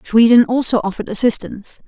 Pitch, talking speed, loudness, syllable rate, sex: 225 Hz, 130 wpm, -15 LUFS, 6.4 syllables/s, female